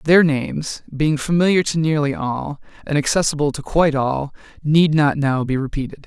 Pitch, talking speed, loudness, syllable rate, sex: 150 Hz, 170 wpm, -19 LUFS, 5.0 syllables/s, male